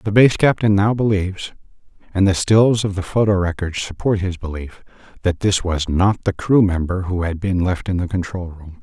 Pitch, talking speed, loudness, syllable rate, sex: 95 Hz, 195 wpm, -18 LUFS, 5.0 syllables/s, male